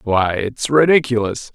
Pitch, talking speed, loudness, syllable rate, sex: 120 Hz, 115 wpm, -16 LUFS, 4.2 syllables/s, male